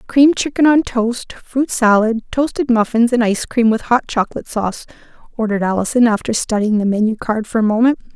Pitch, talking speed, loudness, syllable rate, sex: 230 Hz, 185 wpm, -16 LUFS, 6.0 syllables/s, female